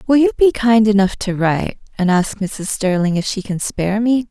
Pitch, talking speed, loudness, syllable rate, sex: 205 Hz, 225 wpm, -17 LUFS, 5.1 syllables/s, female